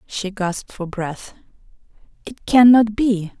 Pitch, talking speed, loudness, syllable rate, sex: 205 Hz, 125 wpm, -17 LUFS, 3.9 syllables/s, female